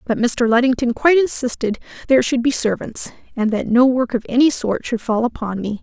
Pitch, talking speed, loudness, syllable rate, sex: 245 Hz, 205 wpm, -18 LUFS, 5.7 syllables/s, female